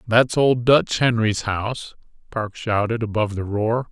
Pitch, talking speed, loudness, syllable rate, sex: 110 Hz, 155 wpm, -20 LUFS, 4.4 syllables/s, male